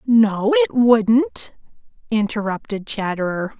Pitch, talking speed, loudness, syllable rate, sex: 225 Hz, 85 wpm, -19 LUFS, 3.6 syllables/s, female